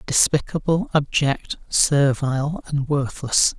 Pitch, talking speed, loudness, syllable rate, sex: 145 Hz, 85 wpm, -21 LUFS, 3.7 syllables/s, male